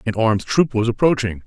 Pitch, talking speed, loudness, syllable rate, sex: 115 Hz, 205 wpm, -18 LUFS, 6.2 syllables/s, male